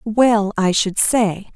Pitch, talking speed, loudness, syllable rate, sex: 205 Hz, 155 wpm, -17 LUFS, 2.8 syllables/s, female